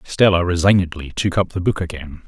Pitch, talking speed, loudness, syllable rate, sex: 90 Hz, 185 wpm, -18 LUFS, 5.7 syllables/s, male